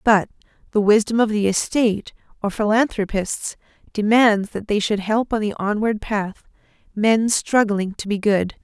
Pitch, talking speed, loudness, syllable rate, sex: 210 Hz, 155 wpm, -20 LUFS, 4.4 syllables/s, female